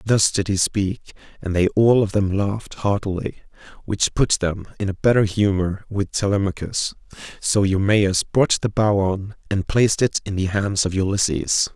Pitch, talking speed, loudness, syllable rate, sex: 100 Hz, 175 wpm, -20 LUFS, 4.7 syllables/s, male